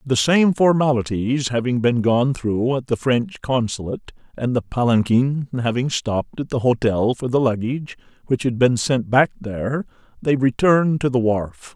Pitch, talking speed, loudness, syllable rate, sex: 125 Hz, 170 wpm, -20 LUFS, 4.7 syllables/s, male